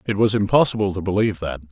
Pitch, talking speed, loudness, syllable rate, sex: 100 Hz, 210 wpm, -20 LUFS, 7.2 syllables/s, male